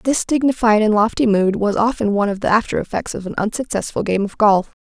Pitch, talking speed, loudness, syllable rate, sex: 215 Hz, 210 wpm, -18 LUFS, 6.1 syllables/s, female